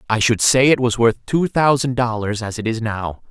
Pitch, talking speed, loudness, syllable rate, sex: 120 Hz, 235 wpm, -18 LUFS, 4.9 syllables/s, male